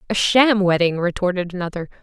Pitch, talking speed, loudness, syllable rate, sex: 190 Hz, 150 wpm, -18 LUFS, 5.8 syllables/s, female